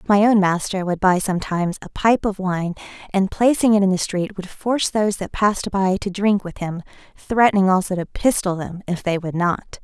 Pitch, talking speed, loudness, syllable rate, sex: 190 Hz, 215 wpm, -20 LUFS, 5.3 syllables/s, female